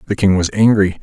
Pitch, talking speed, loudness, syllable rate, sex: 100 Hz, 235 wpm, -14 LUFS, 6.0 syllables/s, male